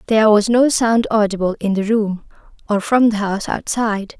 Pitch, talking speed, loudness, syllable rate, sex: 215 Hz, 185 wpm, -17 LUFS, 5.5 syllables/s, female